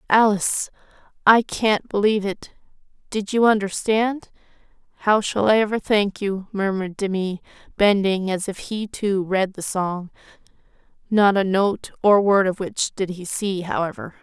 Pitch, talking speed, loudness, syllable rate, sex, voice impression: 200 Hz, 140 wpm, -21 LUFS, 4.5 syllables/s, female, feminine, adult-like, tensed, powerful, clear, intellectual, friendly, lively, intense, sharp